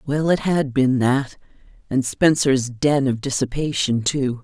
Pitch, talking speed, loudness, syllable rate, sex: 135 Hz, 150 wpm, -20 LUFS, 4.0 syllables/s, female